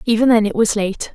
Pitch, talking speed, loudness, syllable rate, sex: 220 Hz, 260 wpm, -16 LUFS, 5.8 syllables/s, female